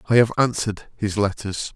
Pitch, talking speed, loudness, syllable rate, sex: 105 Hz, 170 wpm, -22 LUFS, 5.3 syllables/s, male